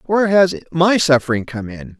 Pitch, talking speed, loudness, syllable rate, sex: 155 Hz, 180 wpm, -15 LUFS, 5.3 syllables/s, male